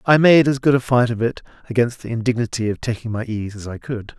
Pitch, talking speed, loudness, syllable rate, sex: 120 Hz, 260 wpm, -19 LUFS, 6.0 syllables/s, male